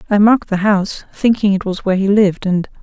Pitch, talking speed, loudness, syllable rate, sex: 200 Hz, 235 wpm, -15 LUFS, 6.7 syllables/s, female